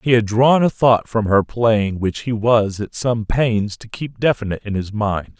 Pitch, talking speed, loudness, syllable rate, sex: 110 Hz, 220 wpm, -18 LUFS, 4.4 syllables/s, male